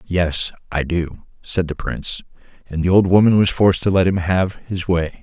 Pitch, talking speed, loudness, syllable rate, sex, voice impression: 90 Hz, 205 wpm, -18 LUFS, 4.8 syllables/s, male, very masculine, very old, very thick, slightly relaxed, very powerful, very dark, very soft, very muffled, slightly halting, very raspy, cool, intellectual, very sincere, very calm, very mature, slightly friendly, slightly reassuring, very unique, elegant, very wild, slightly sweet, slightly lively, kind, very modest